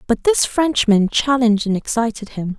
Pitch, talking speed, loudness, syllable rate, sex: 235 Hz, 165 wpm, -17 LUFS, 4.9 syllables/s, female